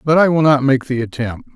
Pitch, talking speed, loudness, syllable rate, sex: 135 Hz, 270 wpm, -16 LUFS, 5.6 syllables/s, male